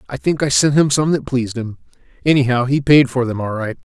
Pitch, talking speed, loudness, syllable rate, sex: 130 Hz, 245 wpm, -16 LUFS, 6.0 syllables/s, male